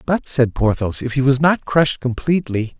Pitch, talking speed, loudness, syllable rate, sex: 130 Hz, 195 wpm, -18 LUFS, 5.4 syllables/s, male